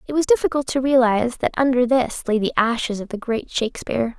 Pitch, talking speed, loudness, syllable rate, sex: 250 Hz, 215 wpm, -20 LUFS, 6.1 syllables/s, female